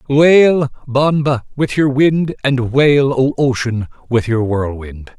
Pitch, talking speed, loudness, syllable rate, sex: 130 Hz, 140 wpm, -15 LUFS, 3.4 syllables/s, male